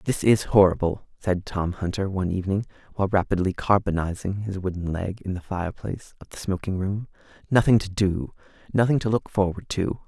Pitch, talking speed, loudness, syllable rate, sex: 95 Hz, 175 wpm, -24 LUFS, 5.7 syllables/s, male